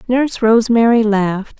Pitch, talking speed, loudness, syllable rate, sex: 225 Hz, 115 wpm, -14 LUFS, 5.6 syllables/s, female